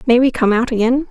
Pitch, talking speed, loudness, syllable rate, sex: 245 Hz, 270 wpm, -15 LUFS, 6.3 syllables/s, female